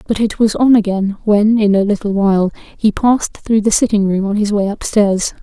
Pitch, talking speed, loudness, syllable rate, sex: 210 Hz, 220 wpm, -14 LUFS, 5.1 syllables/s, female